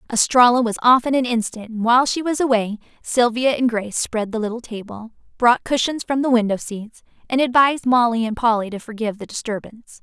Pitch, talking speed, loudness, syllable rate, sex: 235 Hz, 195 wpm, -19 LUFS, 5.9 syllables/s, female